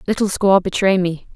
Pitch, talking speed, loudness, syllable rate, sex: 190 Hz, 175 wpm, -17 LUFS, 5.3 syllables/s, female